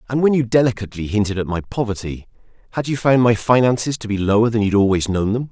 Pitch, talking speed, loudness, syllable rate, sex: 110 Hz, 230 wpm, -18 LUFS, 6.6 syllables/s, male